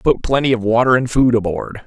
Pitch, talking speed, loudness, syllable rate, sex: 120 Hz, 225 wpm, -16 LUFS, 5.5 syllables/s, male